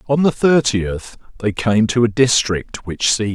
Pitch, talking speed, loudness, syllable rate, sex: 115 Hz, 180 wpm, -17 LUFS, 4.4 syllables/s, male